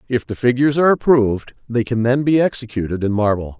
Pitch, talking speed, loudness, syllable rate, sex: 120 Hz, 200 wpm, -17 LUFS, 6.4 syllables/s, male